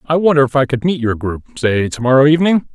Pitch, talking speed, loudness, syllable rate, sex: 140 Hz, 240 wpm, -14 LUFS, 6.2 syllables/s, male